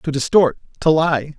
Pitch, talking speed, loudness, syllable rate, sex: 150 Hz, 175 wpm, -17 LUFS, 4.6 syllables/s, male